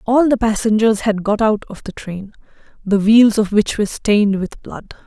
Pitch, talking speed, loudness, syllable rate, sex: 210 Hz, 200 wpm, -16 LUFS, 4.9 syllables/s, female